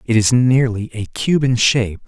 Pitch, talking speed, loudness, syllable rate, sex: 120 Hz, 200 wpm, -16 LUFS, 4.7 syllables/s, male